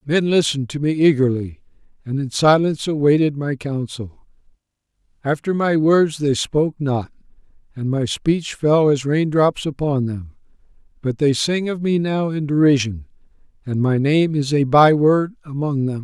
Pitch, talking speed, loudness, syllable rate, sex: 145 Hz, 160 wpm, -18 LUFS, 4.6 syllables/s, male